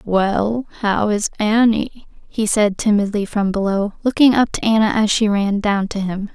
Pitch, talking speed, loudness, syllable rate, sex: 210 Hz, 180 wpm, -17 LUFS, 4.3 syllables/s, female